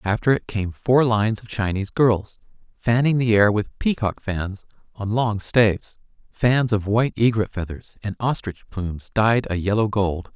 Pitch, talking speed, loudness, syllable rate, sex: 110 Hz, 170 wpm, -21 LUFS, 4.7 syllables/s, male